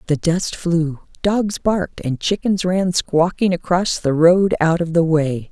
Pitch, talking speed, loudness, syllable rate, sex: 170 Hz, 175 wpm, -18 LUFS, 3.9 syllables/s, female